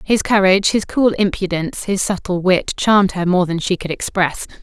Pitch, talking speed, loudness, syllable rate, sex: 190 Hz, 195 wpm, -17 LUFS, 5.3 syllables/s, female